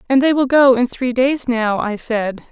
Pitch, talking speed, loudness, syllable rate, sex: 250 Hz, 240 wpm, -16 LUFS, 4.4 syllables/s, female